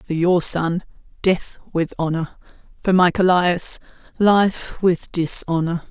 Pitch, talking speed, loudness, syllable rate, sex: 175 Hz, 120 wpm, -19 LUFS, 3.6 syllables/s, female